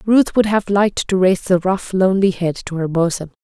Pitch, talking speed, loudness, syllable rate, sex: 185 Hz, 225 wpm, -17 LUFS, 5.7 syllables/s, female